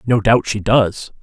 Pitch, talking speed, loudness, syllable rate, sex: 110 Hz, 195 wpm, -16 LUFS, 3.9 syllables/s, male